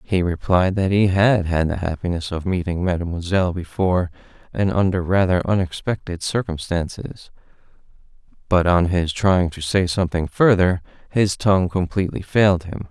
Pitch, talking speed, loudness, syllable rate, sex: 90 Hz, 140 wpm, -20 LUFS, 5.1 syllables/s, male